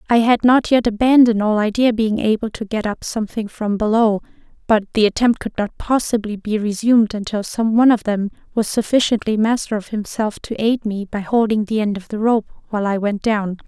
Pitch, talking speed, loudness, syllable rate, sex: 220 Hz, 205 wpm, -18 LUFS, 5.6 syllables/s, female